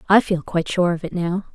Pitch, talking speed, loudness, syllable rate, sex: 180 Hz, 270 wpm, -21 LUFS, 6.2 syllables/s, female